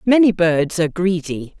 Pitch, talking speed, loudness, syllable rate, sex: 180 Hz, 150 wpm, -17 LUFS, 4.8 syllables/s, female